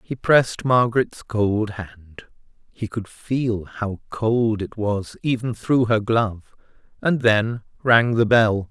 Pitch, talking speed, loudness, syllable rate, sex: 110 Hz, 145 wpm, -21 LUFS, 3.5 syllables/s, male